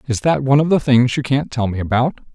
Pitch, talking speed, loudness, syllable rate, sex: 125 Hz, 280 wpm, -17 LUFS, 6.5 syllables/s, male